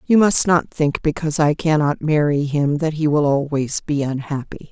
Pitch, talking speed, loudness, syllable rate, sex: 150 Hz, 190 wpm, -19 LUFS, 4.8 syllables/s, female